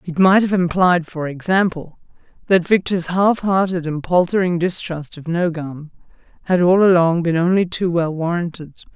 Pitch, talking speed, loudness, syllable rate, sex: 175 Hz, 155 wpm, -17 LUFS, 4.7 syllables/s, female